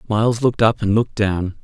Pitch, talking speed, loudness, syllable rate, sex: 110 Hz, 220 wpm, -18 LUFS, 6.3 syllables/s, male